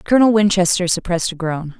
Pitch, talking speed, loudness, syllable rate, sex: 185 Hz, 165 wpm, -16 LUFS, 6.6 syllables/s, female